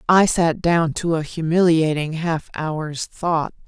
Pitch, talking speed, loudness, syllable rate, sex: 165 Hz, 145 wpm, -20 LUFS, 3.6 syllables/s, female